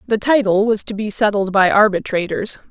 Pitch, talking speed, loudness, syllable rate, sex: 205 Hz, 175 wpm, -16 LUFS, 5.2 syllables/s, female